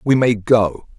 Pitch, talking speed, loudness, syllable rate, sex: 110 Hz, 185 wpm, -16 LUFS, 3.7 syllables/s, male